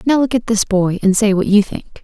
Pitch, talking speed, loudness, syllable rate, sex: 210 Hz, 295 wpm, -15 LUFS, 5.3 syllables/s, female